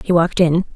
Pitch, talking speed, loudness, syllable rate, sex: 170 Hz, 235 wpm, -16 LUFS, 7.0 syllables/s, female